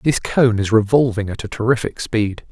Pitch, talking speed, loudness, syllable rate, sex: 115 Hz, 190 wpm, -18 LUFS, 5.0 syllables/s, male